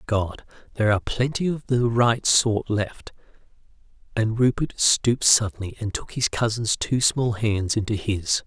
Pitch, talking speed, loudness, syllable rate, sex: 110 Hz, 165 wpm, -22 LUFS, 4.7 syllables/s, male